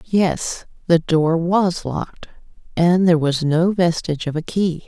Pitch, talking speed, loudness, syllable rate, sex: 170 Hz, 160 wpm, -19 LUFS, 4.2 syllables/s, female